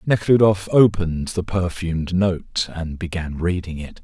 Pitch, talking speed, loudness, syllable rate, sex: 90 Hz, 135 wpm, -20 LUFS, 4.4 syllables/s, male